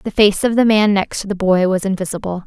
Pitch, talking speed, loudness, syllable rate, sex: 200 Hz, 270 wpm, -16 LUFS, 5.8 syllables/s, female